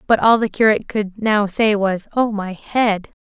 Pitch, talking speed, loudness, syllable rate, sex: 210 Hz, 205 wpm, -18 LUFS, 4.5 syllables/s, female